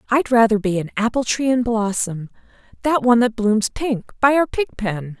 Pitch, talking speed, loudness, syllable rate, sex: 230 Hz, 185 wpm, -19 LUFS, 4.9 syllables/s, female